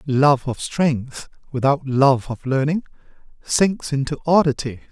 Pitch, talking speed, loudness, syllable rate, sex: 140 Hz, 120 wpm, -20 LUFS, 3.9 syllables/s, male